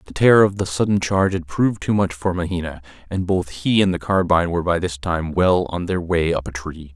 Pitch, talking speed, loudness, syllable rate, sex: 90 Hz, 250 wpm, -20 LUFS, 5.9 syllables/s, male